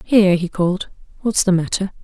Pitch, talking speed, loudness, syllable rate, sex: 190 Hz, 175 wpm, -18 LUFS, 5.8 syllables/s, female